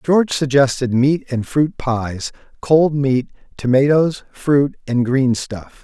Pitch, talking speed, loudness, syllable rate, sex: 135 Hz, 135 wpm, -17 LUFS, 3.6 syllables/s, male